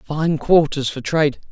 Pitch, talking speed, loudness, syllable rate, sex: 150 Hz, 160 wpm, -18 LUFS, 4.3 syllables/s, male